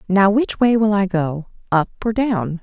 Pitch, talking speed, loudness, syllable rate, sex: 200 Hz, 185 wpm, -18 LUFS, 4.4 syllables/s, female